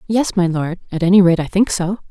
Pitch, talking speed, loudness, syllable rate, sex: 185 Hz, 255 wpm, -16 LUFS, 5.8 syllables/s, female